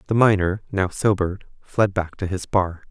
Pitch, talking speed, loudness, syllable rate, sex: 95 Hz, 185 wpm, -22 LUFS, 4.9 syllables/s, male